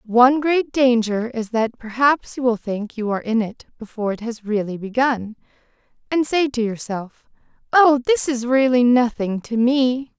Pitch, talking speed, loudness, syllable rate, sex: 240 Hz, 170 wpm, -19 LUFS, 4.6 syllables/s, female